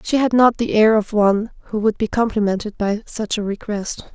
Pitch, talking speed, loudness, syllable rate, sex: 215 Hz, 215 wpm, -19 LUFS, 5.4 syllables/s, female